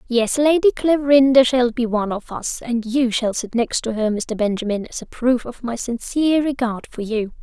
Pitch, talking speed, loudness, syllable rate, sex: 245 Hz, 210 wpm, -19 LUFS, 4.9 syllables/s, female